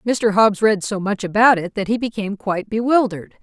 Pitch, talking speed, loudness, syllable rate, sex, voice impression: 210 Hz, 210 wpm, -18 LUFS, 5.9 syllables/s, female, feminine, middle-aged, tensed, powerful, hard, clear, intellectual, calm, elegant, lively, strict, sharp